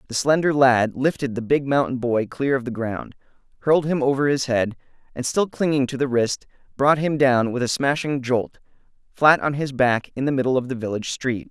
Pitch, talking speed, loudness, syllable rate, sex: 130 Hz, 215 wpm, -21 LUFS, 5.3 syllables/s, male